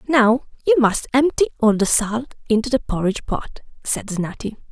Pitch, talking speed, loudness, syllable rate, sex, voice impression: 240 Hz, 165 wpm, -19 LUFS, 5.1 syllables/s, female, feminine, slightly adult-like, slightly cute, refreshing, slightly sincere, friendly